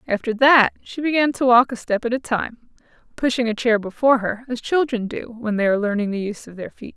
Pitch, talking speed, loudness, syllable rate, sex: 235 Hz, 240 wpm, -20 LUFS, 5.9 syllables/s, female